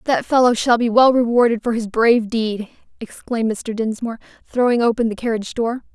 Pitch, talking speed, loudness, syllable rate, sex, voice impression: 230 Hz, 180 wpm, -18 LUFS, 5.8 syllables/s, female, feminine, adult-like, tensed, bright, clear, fluent, intellectual, elegant, lively, slightly sharp, light